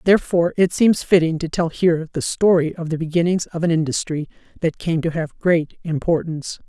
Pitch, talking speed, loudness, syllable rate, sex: 165 Hz, 190 wpm, -20 LUFS, 5.7 syllables/s, female